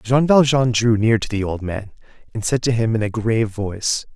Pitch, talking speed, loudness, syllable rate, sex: 115 Hz, 230 wpm, -19 LUFS, 5.2 syllables/s, male